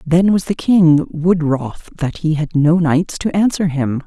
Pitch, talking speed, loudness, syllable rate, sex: 165 Hz, 205 wpm, -16 LUFS, 3.9 syllables/s, female